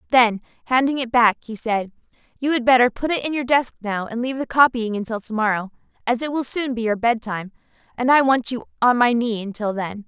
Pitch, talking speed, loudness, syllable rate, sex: 240 Hz, 225 wpm, -20 LUFS, 5.9 syllables/s, female